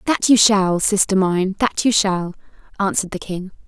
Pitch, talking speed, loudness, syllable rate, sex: 195 Hz, 180 wpm, -17 LUFS, 4.8 syllables/s, female